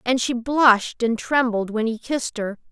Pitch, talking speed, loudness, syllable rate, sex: 235 Hz, 200 wpm, -21 LUFS, 4.8 syllables/s, female